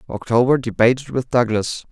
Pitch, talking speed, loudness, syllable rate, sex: 120 Hz, 125 wpm, -18 LUFS, 5.4 syllables/s, male